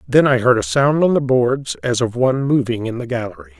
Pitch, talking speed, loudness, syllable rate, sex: 130 Hz, 250 wpm, -17 LUFS, 5.7 syllables/s, male